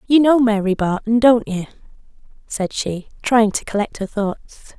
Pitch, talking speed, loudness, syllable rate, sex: 220 Hz, 165 wpm, -18 LUFS, 4.8 syllables/s, female